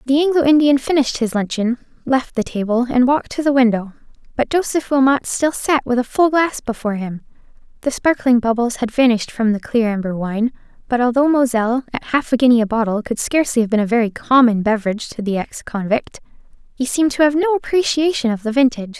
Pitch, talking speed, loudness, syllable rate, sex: 250 Hz, 205 wpm, -17 LUFS, 6.2 syllables/s, female